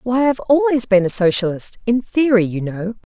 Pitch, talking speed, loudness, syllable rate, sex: 215 Hz, 170 wpm, -17 LUFS, 5.4 syllables/s, female